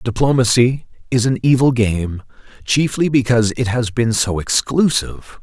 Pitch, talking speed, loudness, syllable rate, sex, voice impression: 120 Hz, 135 wpm, -16 LUFS, 4.7 syllables/s, male, masculine, adult-like, tensed, powerful, clear, fluent, raspy, cool, intellectual, mature, friendly, wild, lively, slightly strict